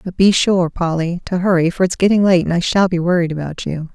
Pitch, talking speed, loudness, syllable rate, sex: 175 Hz, 260 wpm, -16 LUFS, 5.8 syllables/s, female